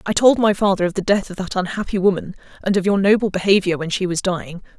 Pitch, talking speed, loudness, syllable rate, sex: 190 Hz, 250 wpm, -19 LUFS, 6.6 syllables/s, female